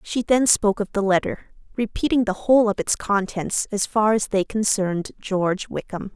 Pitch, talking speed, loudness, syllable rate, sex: 210 Hz, 185 wpm, -21 LUFS, 5.1 syllables/s, female